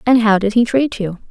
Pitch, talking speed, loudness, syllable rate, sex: 220 Hz, 275 wpm, -15 LUFS, 5.5 syllables/s, female